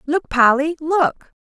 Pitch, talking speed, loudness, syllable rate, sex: 305 Hz, 125 wpm, -17 LUFS, 3.4 syllables/s, female